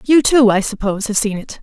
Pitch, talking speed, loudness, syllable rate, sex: 225 Hz, 260 wpm, -15 LUFS, 5.9 syllables/s, female